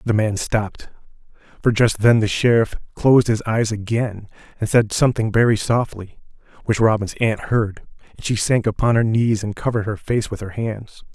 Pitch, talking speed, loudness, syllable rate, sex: 110 Hz, 185 wpm, -19 LUFS, 5.1 syllables/s, male